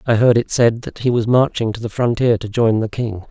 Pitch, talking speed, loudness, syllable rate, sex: 115 Hz, 275 wpm, -17 LUFS, 5.4 syllables/s, male